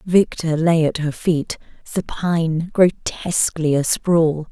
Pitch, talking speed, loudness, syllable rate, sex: 165 Hz, 105 wpm, -19 LUFS, 3.6 syllables/s, female